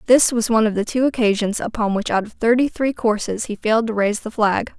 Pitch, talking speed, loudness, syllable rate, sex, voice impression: 220 Hz, 250 wpm, -19 LUFS, 6.1 syllables/s, female, very feminine, young, very thin, very tensed, powerful, very bright, hard, very clear, fluent, very cute, slightly cool, intellectual, very refreshing, very sincere, calm, very friendly, very reassuring, unique, very elegant, slightly wild, sweet, very lively, very strict, sharp, slightly light